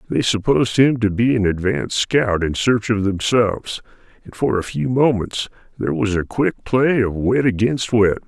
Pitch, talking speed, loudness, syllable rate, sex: 110 Hz, 190 wpm, -18 LUFS, 4.8 syllables/s, male